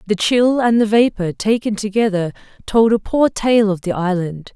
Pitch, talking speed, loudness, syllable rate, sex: 210 Hz, 185 wpm, -16 LUFS, 4.7 syllables/s, female